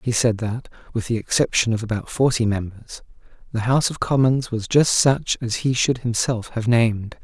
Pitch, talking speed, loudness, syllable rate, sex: 120 Hz, 190 wpm, -21 LUFS, 5.0 syllables/s, male